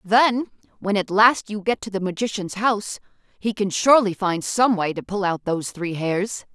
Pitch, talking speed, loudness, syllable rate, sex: 200 Hz, 200 wpm, -21 LUFS, 4.9 syllables/s, female